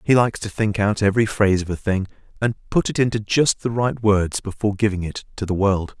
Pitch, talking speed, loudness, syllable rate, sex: 105 Hz, 240 wpm, -21 LUFS, 5.9 syllables/s, male